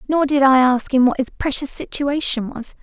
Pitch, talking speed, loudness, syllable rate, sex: 270 Hz, 210 wpm, -18 LUFS, 5.2 syllables/s, female